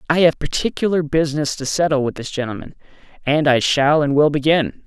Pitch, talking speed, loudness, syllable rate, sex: 150 Hz, 185 wpm, -18 LUFS, 5.7 syllables/s, male